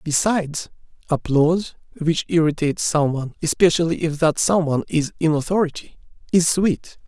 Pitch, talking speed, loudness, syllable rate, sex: 160 Hz, 135 wpm, -20 LUFS, 5.4 syllables/s, male